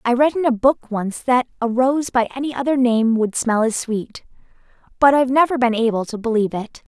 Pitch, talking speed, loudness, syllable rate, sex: 245 Hz, 215 wpm, -18 LUFS, 5.4 syllables/s, female